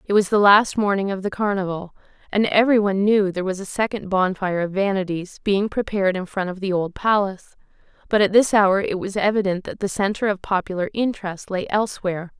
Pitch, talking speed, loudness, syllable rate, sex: 195 Hz, 205 wpm, -21 LUFS, 6.1 syllables/s, female